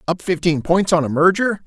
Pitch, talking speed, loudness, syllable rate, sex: 175 Hz, 215 wpm, -17 LUFS, 5.2 syllables/s, male